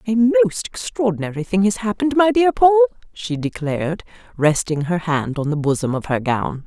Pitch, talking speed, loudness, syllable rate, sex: 180 Hz, 180 wpm, -19 LUFS, 5.2 syllables/s, female